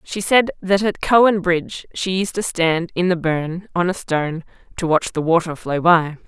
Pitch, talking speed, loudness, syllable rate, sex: 175 Hz, 210 wpm, -19 LUFS, 4.7 syllables/s, female